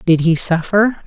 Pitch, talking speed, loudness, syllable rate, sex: 180 Hz, 170 wpm, -14 LUFS, 4.2 syllables/s, female